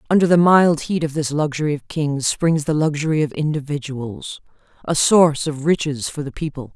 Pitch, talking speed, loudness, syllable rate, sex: 150 Hz, 185 wpm, -19 LUFS, 5.3 syllables/s, female